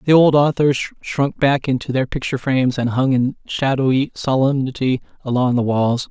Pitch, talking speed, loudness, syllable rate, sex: 130 Hz, 165 wpm, -18 LUFS, 5.0 syllables/s, male